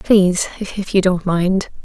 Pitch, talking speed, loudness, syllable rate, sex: 185 Hz, 130 wpm, -17 LUFS, 4.0 syllables/s, female